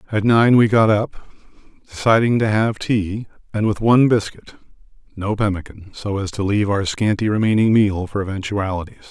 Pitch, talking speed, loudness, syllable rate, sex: 105 Hz, 165 wpm, -18 LUFS, 5.4 syllables/s, male